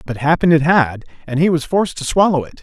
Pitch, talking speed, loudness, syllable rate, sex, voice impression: 150 Hz, 250 wpm, -16 LUFS, 6.9 syllables/s, male, masculine, middle-aged, slightly muffled, sincere, friendly